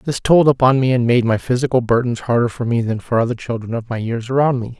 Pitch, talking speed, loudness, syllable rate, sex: 120 Hz, 265 wpm, -17 LUFS, 6.1 syllables/s, male